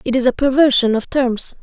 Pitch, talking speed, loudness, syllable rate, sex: 255 Hz, 220 wpm, -15 LUFS, 5.4 syllables/s, female